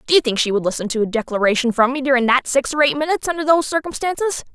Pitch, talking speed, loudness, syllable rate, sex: 270 Hz, 265 wpm, -18 LUFS, 7.4 syllables/s, female